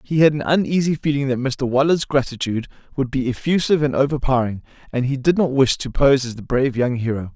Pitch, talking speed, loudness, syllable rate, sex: 135 Hz, 210 wpm, -19 LUFS, 6.3 syllables/s, male